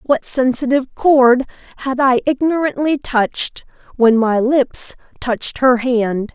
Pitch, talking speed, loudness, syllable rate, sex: 255 Hz, 125 wpm, -16 LUFS, 4.0 syllables/s, female